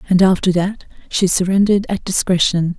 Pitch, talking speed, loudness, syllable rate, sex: 185 Hz, 150 wpm, -16 LUFS, 5.4 syllables/s, female